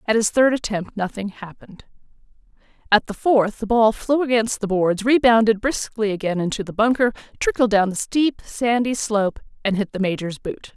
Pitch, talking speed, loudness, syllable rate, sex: 220 Hz, 180 wpm, -20 LUFS, 5.2 syllables/s, female